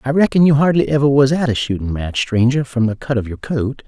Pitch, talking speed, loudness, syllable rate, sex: 130 Hz, 265 wpm, -16 LUFS, 5.8 syllables/s, male